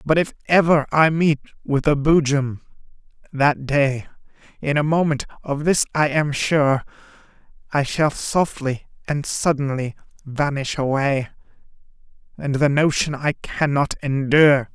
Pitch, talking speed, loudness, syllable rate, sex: 145 Hz, 125 wpm, -20 LUFS, 4.6 syllables/s, male